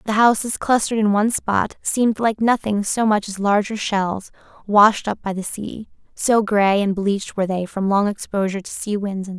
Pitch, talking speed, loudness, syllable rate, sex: 205 Hz, 210 wpm, -19 LUFS, 5.2 syllables/s, female